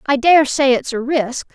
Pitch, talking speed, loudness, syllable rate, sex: 270 Hz, 235 wpm, -15 LUFS, 4.3 syllables/s, female